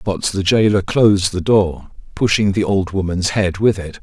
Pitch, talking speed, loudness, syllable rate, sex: 100 Hz, 195 wpm, -16 LUFS, 4.6 syllables/s, male